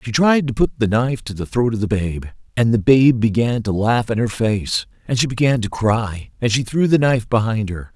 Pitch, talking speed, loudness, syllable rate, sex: 115 Hz, 250 wpm, -18 LUFS, 5.3 syllables/s, male